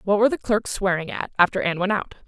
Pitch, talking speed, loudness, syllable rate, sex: 195 Hz, 265 wpm, -22 LUFS, 6.5 syllables/s, female